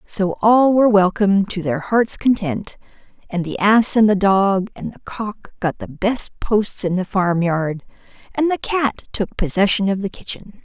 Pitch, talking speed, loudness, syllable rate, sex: 200 Hz, 180 wpm, -18 LUFS, 4.3 syllables/s, female